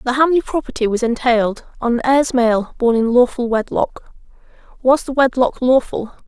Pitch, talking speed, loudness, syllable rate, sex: 250 Hz, 155 wpm, -17 LUFS, 4.9 syllables/s, female